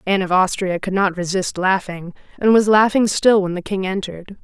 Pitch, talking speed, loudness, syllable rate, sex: 190 Hz, 205 wpm, -18 LUFS, 5.5 syllables/s, female